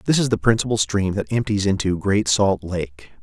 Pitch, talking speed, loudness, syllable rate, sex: 100 Hz, 205 wpm, -20 LUFS, 5.1 syllables/s, male